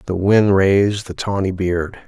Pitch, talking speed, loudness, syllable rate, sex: 95 Hz, 175 wpm, -17 LUFS, 4.3 syllables/s, male